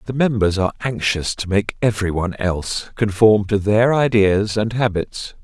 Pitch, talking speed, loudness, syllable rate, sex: 105 Hz, 155 wpm, -18 LUFS, 4.7 syllables/s, male